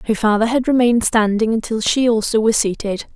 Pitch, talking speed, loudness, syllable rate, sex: 225 Hz, 190 wpm, -17 LUFS, 5.8 syllables/s, female